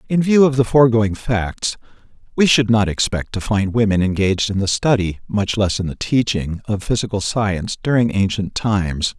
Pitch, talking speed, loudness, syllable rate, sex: 105 Hz, 185 wpm, -18 LUFS, 5.1 syllables/s, male